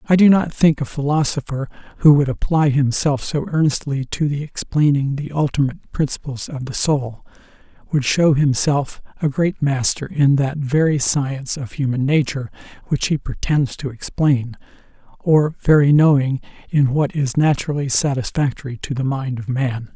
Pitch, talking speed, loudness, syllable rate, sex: 140 Hz, 155 wpm, -19 LUFS, 4.9 syllables/s, male